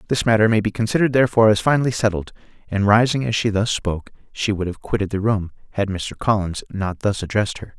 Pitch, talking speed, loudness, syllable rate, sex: 105 Hz, 215 wpm, -20 LUFS, 6.6 syllables/s, male